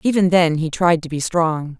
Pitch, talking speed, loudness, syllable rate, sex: 165 Hz, 235 wpm, -18 LUFS, 4.7 syllables/s, female